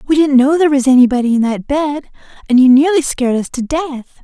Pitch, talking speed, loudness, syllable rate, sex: 275 Hz, 225 wpm, -13 LUFS, 6.6 syllables/s, female